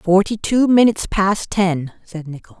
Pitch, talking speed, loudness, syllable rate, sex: 195 Hz, 160 wpm, -17 LUFS, 4.5 syllables/s, female